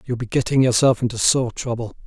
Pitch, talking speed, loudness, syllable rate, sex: 120 Hz, 230 wpm, -19 LUFS, 6.4 syllables/s, male